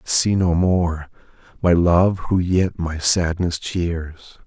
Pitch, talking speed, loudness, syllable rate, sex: 85 Hz, 150 wpm, -19 LUFS, 3.2 syllables/s, male